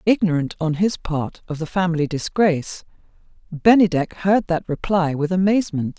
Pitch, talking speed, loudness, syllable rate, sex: 175 Hz, 140 wpm, -20 LUFS, 5.1 syllables/s, female